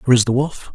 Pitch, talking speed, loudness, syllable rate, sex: 130 Hz, 320 wpm, -18 LUFS, 7.9 syllables/s, male